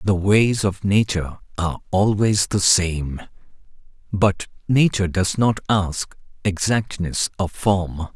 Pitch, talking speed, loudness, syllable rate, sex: 95 Hz, 120 wpm, -20 LUFS, 3.8 syllables/s, male